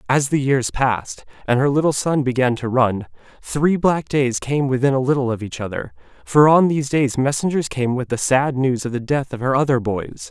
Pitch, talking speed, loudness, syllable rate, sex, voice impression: 135 Hz, 220 wpm, -19 LUFS, 5.2 syllables/s, male, very masculine, slightly young, slightly adult-like, slightly thick, tensed, slightly powerful, very bright, hard, clear, very fluent, slightly cool, intellectual, refreshing, sincere, slightly calm, very friendly, slightly reassuring, very unique, slightly elegant, slightly wild, slightly sweet, very lively, slightly kind, intense, very light